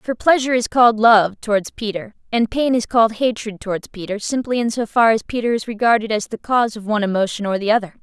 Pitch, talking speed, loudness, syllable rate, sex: 225 Hz, 230 wpm, -18 LUFS, 6.3 syllables/s, female